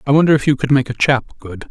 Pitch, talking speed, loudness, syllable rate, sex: 135 Hz, 315 wpm, -15 LUFS, 7.0 syllables/s, male